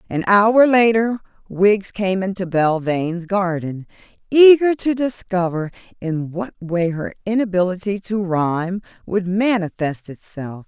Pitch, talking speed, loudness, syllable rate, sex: 190 Hz, 120 wpm, -18 LUFS, 4.1 syllables/s, female